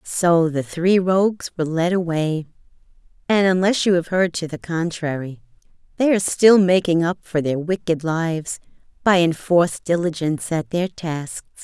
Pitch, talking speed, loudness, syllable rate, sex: 170 Hz, 155 wpm, -20 LUFS, 4.7 syllables/s, female